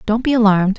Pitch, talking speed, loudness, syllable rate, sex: 220 Hz, 230 wpm, -15 LUFS, 7.5 syllables/s, female